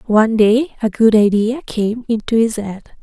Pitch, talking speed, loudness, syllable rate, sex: 220 Hz, 180 wpm, -15 LUFS, 4.6 syllables/s, female